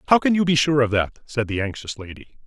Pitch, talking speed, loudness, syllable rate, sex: 130 Hz, 270 wpm, -21 LUFS, 6.4 syllables/s, male